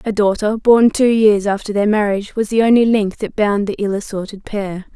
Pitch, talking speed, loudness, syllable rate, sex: 210 Hz, 220 wpm, -16 LUFS, 5.2 syllables/s, female